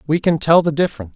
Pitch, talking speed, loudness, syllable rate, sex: 155 Hz, 260 wpm, -16 LUFS, 8.1 syllables/s, male